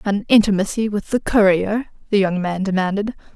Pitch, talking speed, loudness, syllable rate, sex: 200 Hz, 160 wpm, -18 LUFS, 5.2 syllables/s, female